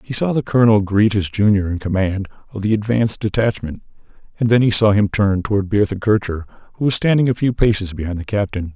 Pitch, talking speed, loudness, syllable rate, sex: 105 Hz, 215 wpm, -17 LUFS, 6.1 syllables/s, male